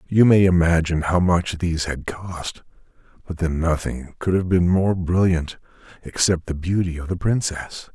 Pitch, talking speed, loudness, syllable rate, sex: 85 Hz, 165 wpm, -21 LUFS, 4.6 syllables/s, male